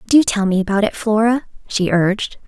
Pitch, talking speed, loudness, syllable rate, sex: 210 Hz, 195 wpm, -17 LUFS, 5.3 syllables/s, female